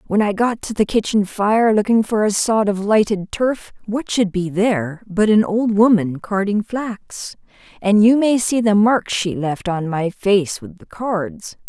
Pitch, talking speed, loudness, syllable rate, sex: 210 Hz, 195 wpm, -18 LUFS, 4.1 syllables/s, female